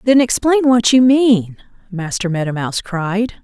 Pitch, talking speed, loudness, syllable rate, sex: 215 Hz, 155 wpm, -15 LUFS, 4.5 syllables/s, female